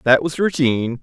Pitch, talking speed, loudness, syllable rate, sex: 135 Hz, 175 wpm, -18 LUFS, 5.5 syllables/s, male